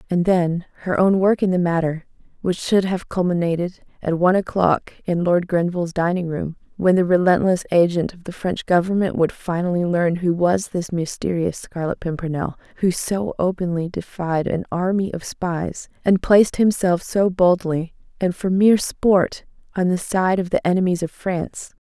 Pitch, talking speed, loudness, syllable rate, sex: 180 Hz, 170 wpm, -20 LUFS, 4.9 syllables/s, female